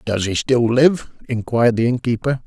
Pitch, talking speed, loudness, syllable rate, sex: 120 Hz, 170 wpm, -18 LUFS, 5.1 syllables/s, male